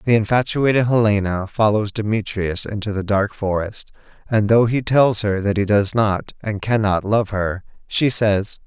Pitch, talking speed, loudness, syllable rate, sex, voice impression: 105 Hz, 165 wpm, -19 LUFS, 4.5 syllables/s, male, very masculine, very adult-like, very thick, slightly relaxed, slightly weak, dark, hard, clear, fluent, cool, very intellectual, slightly refreshing, sincere, very calm, mature, very friendly, very reassuring, unique, slightly elegant, wild, very sweet, slightly lively, strict, slightly sharp, modest